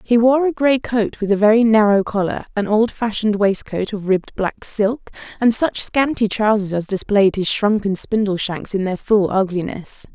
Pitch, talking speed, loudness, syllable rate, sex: 210 Hz, 185 wpm, -18 LUFS, 4.8 syllables/s, female